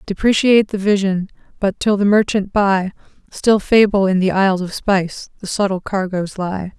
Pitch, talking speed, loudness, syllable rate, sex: 195 Hz, 170 wpm, -17 LUFS, 5.0 syllables/s, female